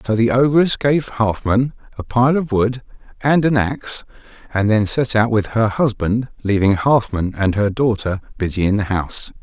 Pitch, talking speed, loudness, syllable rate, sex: 115 Hz, 180 wpm, -18 LUFS, 4.7 syllables/s, male